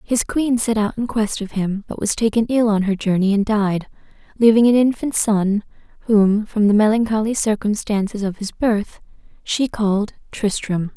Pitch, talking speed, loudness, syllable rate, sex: 215 Hz, 175 wpm, -19 LUFS, 4.7 syllables/s, female